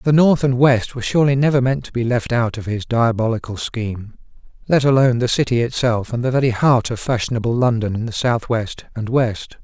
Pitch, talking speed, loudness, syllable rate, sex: 120 Hz, 200 wpm, -18 LUFS, 5.8 syllables/s, male